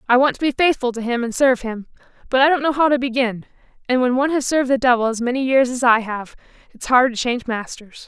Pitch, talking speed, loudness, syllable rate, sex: 250 Hz, 260 wpm, -18 LUFS, 6.6 syllables/s, female